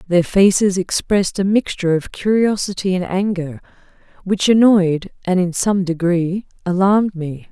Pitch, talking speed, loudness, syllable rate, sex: 185 Hz, 135 wpm, -17 LUFS, 4.6 syllables/s, female